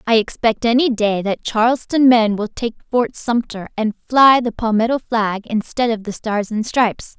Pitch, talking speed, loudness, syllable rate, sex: 230 Hz, 185 wpm, -17 LUFS, 4.7 syllables/s, female